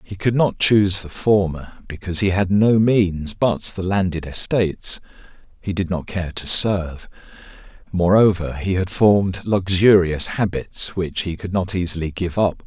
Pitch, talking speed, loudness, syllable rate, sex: 95 Hz, 160 wpm, -19 LUFS, 4.3 syllables/s, male